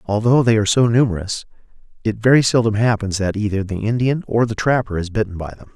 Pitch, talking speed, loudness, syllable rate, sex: 110 Hz, 210 wpm, -18 LUFS, 6.2 syllables/s, male